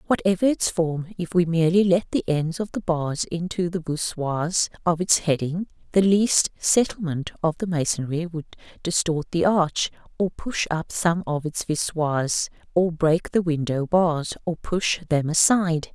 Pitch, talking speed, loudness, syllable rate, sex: 170 Hz, 165 wpm, -23 LUFS, 4.3 syllables/s, female